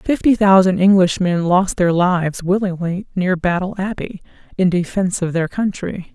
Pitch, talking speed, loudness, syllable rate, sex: 185 Hz, 145 wpm, -17 LUFS, 4.8 syllables/s, female